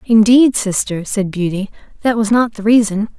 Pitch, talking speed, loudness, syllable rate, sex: 215 Hz, 170 wpm, -15 LUFS, 4.8 syllables/s, female